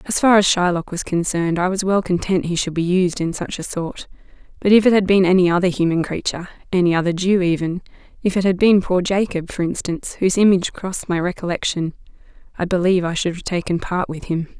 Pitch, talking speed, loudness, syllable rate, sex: 180 Hz, 210 wpm, -19 LUFS, 6.2 syllables/s, female